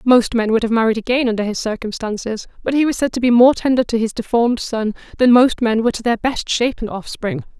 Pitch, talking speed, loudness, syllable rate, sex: 235 Hz, 235 wpm, -17 LUFS, 6.0 syllables/s, female